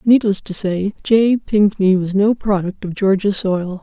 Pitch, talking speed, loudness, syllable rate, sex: 200 Hz, 170 wpm, -16 LUFS, 4.1 syllables/s, female